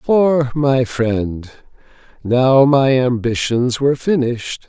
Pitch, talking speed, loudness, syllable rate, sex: 130 Hz, 105 wpm, -16 LUFS, 3.4 syllables/s, male